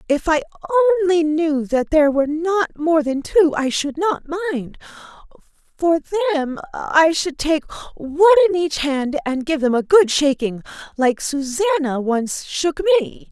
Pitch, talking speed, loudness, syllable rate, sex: 315 Hz, 160 wpm, -18 LUFS, 4.5 syllables/s, female